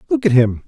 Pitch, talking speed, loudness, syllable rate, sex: 140 Hz, 265 wpm, -15 LUFS, 6.5 syllables/s, male